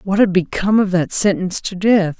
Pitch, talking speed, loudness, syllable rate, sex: 190 Hz, 220 wpm, -16 LUFS, 5.7 syllables/s, female